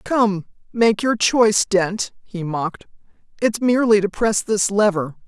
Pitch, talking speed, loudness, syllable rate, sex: 205 Hz, 150 wpm, -19 LUFS, 4.3 syllables/s, female